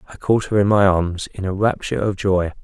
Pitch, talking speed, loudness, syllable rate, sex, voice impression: 95 Hz, 250 wpm, -19 LUFS, 5.7 syllables/s, male, very masculine, middle-aged, thick, tensed, slightly powerful, slightly dark, slightly soft, muffled, slightly fluent, raspy, cool, intellectual, slightly refreshing, sincere, very calm, mature, friendly, very reassuring, unique, elegant, wild, sweet, lively, kind, modest